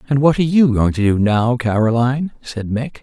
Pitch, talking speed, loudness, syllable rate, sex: 125 Hz, 220 wpm, -16 LUFS, 5.4 syllables/s, male